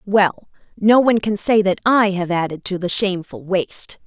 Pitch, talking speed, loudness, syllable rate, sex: 195 Hz, 190 wpm, -18 LUFS, 5.1 syllables/s, female